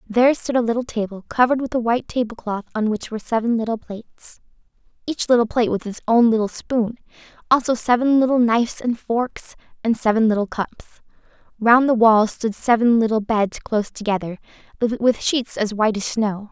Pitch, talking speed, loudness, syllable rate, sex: 230 Hz, 175 wpm, -20 LUFS, 4.9 syllables/s, female